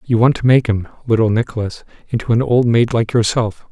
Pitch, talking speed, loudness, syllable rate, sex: 115 Hz, 175 wpm, -16 LUFS, 5.8 syllables/s, male